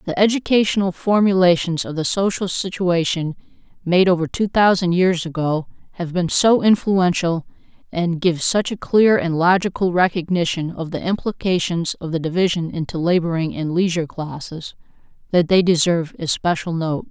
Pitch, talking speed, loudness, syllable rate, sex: 175 Hz, 145 wpm, -19 LUFS, 5.0 syllables/s, female